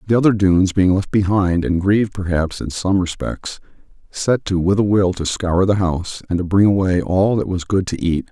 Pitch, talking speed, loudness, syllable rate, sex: 95 Hz, 225 wpm, -18 LUFS, 5.2 syllables/s, male